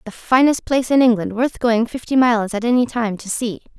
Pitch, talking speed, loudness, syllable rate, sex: 235 Hz, 205 wpm, -18 LUFS, 5.7 syllables/s, female